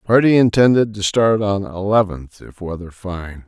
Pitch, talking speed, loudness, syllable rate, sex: 100 Hz, 155 wpm, -16 LUFS, 4.5 syllables/s, male